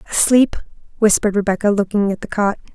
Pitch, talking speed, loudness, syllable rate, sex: 205 Hz, 155 wpm, -17 LUFS, 6.6 syllables/s, female